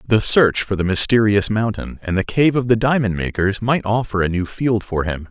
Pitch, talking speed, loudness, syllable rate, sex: 105 Hz, 225 wpm, -18 LUFS, 5.1 syllables/s, male